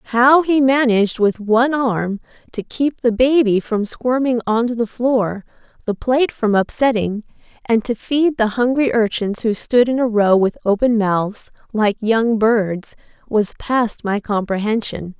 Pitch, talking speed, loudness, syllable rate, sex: 230 Hz, 160 wpm, -17 LUFS, 4.2 syllables/s, female